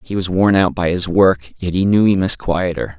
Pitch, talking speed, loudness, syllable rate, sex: 90 Hz, 280 wpm, -16 LUFS, 4.9 syllables/s, male